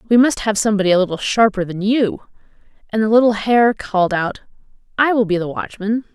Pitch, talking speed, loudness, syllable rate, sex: 215 Hz, 195 wpm, -17 LUFS, 6.0 syllables/s, female